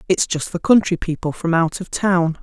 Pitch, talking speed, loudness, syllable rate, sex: 175 Hz, 225 wpm, -19 LUFS, 4.9 syllables/s, female